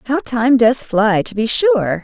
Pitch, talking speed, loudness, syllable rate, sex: 235 Hz, 205 wpm, -14 LUFS, 3.8 syllables/s, female